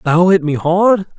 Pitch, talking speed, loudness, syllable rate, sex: 175 Hz, 200 wpm, -13 LUFS, 4.1 syllables/s, male